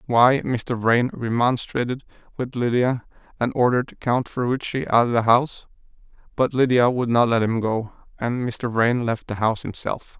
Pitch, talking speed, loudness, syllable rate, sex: 120 Hz, 165 wpm, -22 LUFS, 4.7 syllables/s, male